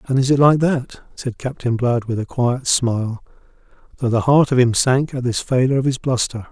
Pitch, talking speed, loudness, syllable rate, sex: 125 Hz, 220 wpm, -18 LUFS, 5.2 syllables/s, male